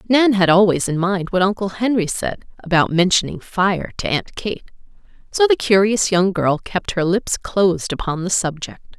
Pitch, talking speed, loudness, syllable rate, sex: 190 Hz, 180 wpm, -18 LUFS, 4.7 syllables/s, female